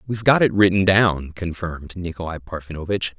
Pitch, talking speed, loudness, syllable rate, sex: 90 Hz, 150 wpm, -20 LUFS, 5.8 syllables/s, male